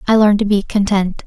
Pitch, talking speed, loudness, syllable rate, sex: 205 Hz, 235 wpm, -15 LUFS, 5.6 syllables/s, female